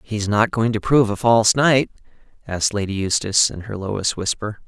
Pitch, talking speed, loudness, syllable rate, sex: 105 Hz, 205 wpm, -19 LUFS, 6.0 syllables/s, male